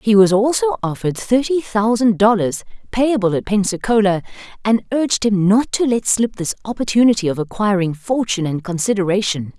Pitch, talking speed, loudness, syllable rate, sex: 210 Hz, 150 wpm, -17 LUFS, 5.5 syllables/s, female